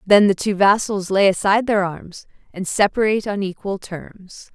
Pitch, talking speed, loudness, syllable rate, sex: 195 Hz, 170 wpm, -18 LUFS, 4.8 syllables/s, female